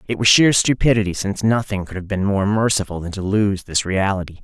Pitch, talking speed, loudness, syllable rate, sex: 100 Hz, 215 wpm, -18 LUFS, 5.9 syllables/s, male